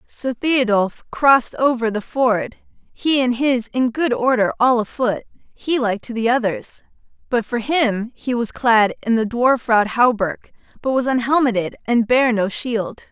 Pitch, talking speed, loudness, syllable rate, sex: 240 Hz, 170 wpm, -18 LUFS, 4.3 syllables/s, female